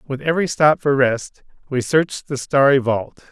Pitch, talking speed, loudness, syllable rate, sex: 140 Hz, 180 wpm, -18 LUFS, 4.6 syllables/s, male